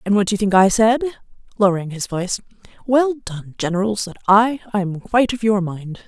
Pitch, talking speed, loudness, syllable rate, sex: 205 Hz, 190 wpm, -18 LUFS, 5.9 syllables/s, female